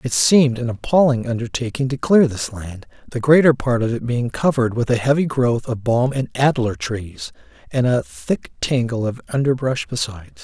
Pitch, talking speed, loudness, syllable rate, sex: 120 Hz, 185 wpm, -19 LUFS, 5.1 syllables/s, male